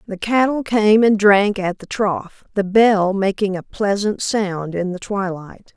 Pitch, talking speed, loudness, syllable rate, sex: 200 Hz, 175 wpm, -18 LUFS, 3.8 syllables/s, female